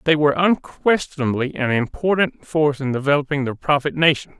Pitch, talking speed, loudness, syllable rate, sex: 145 Hz, 150 wpm, -19 LUFS, 5.7 syllables/s, male